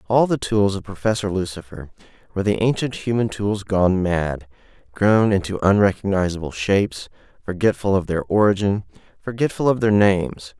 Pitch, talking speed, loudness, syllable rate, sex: 100 Hz, 140 wpm, -20 LUFS, 5.2 syllables/s, male